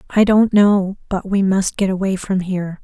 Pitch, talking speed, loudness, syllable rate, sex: 195 Hz, 190 wpm, -17 LUFS, 4.7 syllables/s, female